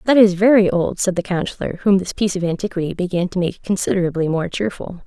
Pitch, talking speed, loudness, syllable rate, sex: 185 Hz, 215 wpm, -18 LUFS, 6.4 syllables/s, female